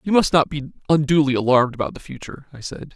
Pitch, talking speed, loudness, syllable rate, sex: 145 Hz, 225 wpm, -19 LUFS, 7.1 syllables/s, male